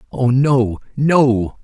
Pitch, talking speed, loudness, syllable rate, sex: 130 Hz, 110 wpm, -16 LUFS, 2.4 syllables/s, male